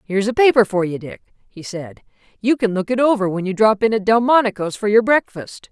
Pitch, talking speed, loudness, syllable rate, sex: 210 Hz, 230 wpm, -17 LUFS, 5.8 syllables/s, female